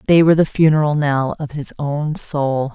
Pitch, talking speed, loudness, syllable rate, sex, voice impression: 150 Hz, 195 wpm, -17 LUFS, 4.8 syllables/s, female, feminine, adult-like, tensed, powerful, hard, clear, fluent, intellectual, elegant, lively, slightly strict, sharp